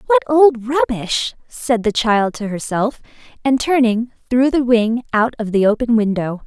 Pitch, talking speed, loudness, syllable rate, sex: 235 Hz, 165 wpm, -17 LUFS, 4.2 syllables/s, female